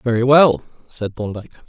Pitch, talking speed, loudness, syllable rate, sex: 120 Hz, 145 wpm, -16 LUFS, 5.5 syllables/s, male